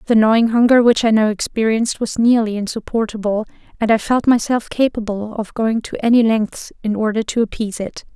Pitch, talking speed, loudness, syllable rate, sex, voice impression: 220 Hz, 185 wpm, -17 LUFS, 5.7 syllables/s, female, feminine, young, cute, friendly, slightly kind